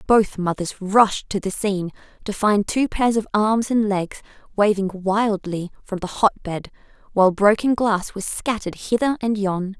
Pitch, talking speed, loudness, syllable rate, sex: 205 Hz, 170 wpm, -21 LUFS, 4.5 syllables/s, female